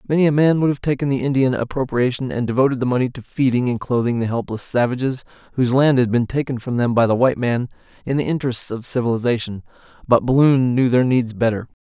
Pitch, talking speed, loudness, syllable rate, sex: 125 Hz, 215 wpm, -19 LUFS, 6.4 syllables/s, male